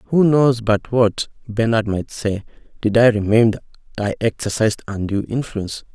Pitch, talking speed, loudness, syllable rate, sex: 110 Hz, 150 wpm, -19 LUFS, 5.0 syllables/s, male